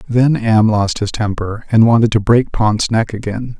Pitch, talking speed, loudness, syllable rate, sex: 110 Hz, 200 wpm, -14 LUFS, 4.4 syllables/s, male